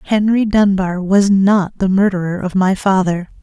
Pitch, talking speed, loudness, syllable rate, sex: 195 Hz, 160 wpm, -15 LUFS, 4.5 syllables/s, female